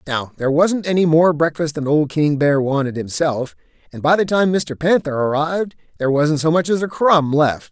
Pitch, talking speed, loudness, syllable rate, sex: 155 Hz, 210 wpm, -17 LUFS, 5.2 syllables/s, male